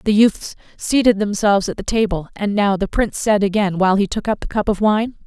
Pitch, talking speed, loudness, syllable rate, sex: 205 Hz, 240 wpm, -18 LUFS, 5.8 syllables/s, female